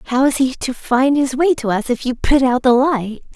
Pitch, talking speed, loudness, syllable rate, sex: 260 Hz, 270 wpm, -16 LUFS, 4.8 syllables/s, female